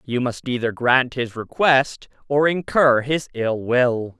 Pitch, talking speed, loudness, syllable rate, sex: 130 Hz, 155 wpm, -20 LUFS, 3.7 syllables/s, male